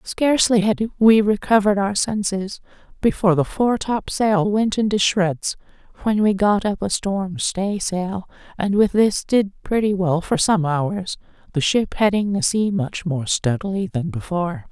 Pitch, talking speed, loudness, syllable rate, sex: 195 Hz, 155 wpm, -20 LUFS, 4.4 syllables/s, female